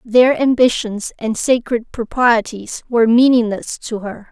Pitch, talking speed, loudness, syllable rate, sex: 230 Hz, 125 wpm, -16 LUFS, 4.1 syllables/s, female